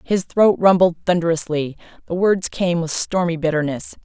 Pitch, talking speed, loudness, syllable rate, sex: 170 Hz, 150 wpm, -18 LUFS, 4.8 syllables/s, female